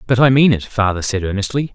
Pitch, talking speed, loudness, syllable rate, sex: 115 Hz, 240 wpm, -16 LUFS, 6.3 syllables/s, male